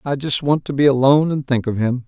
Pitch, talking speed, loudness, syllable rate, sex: 135 Hz, 290 wpm, -17 LUFS, 6.1 syllables/s, male